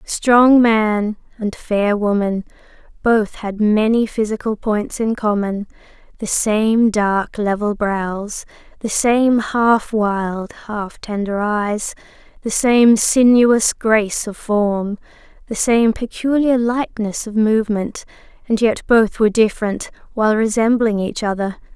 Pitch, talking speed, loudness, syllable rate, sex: 215 Hz, 110 wpm, -17 LUFS, 3.6 syllables/s, female